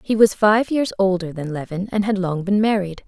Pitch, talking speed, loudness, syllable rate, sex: 195 Hz, 235 wpm, -19 LUFS, 5.1 syllables/s, female